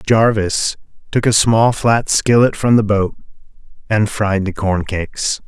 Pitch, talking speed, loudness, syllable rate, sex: 105 Hz, 155 wpm, -15 LUFS, 3.8 syllables/s, male